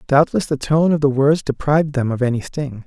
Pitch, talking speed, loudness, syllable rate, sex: 140 Hz, 230 wpm, -18 LUFS, 5.5 syllables/s, male